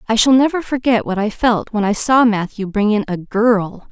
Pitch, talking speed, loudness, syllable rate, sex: 220 Hz, 230 wpm, -16 LUFS, 5.2 syllables/s, female